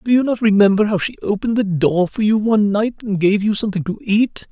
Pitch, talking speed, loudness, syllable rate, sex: 210 Hz, 255 wpm, -17 LUFS, 6.1 syllables/s, male